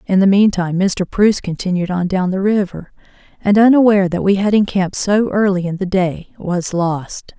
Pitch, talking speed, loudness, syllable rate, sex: 190 Hz, 185 wpm, -15 LUFS, 5.1 syllables/s, female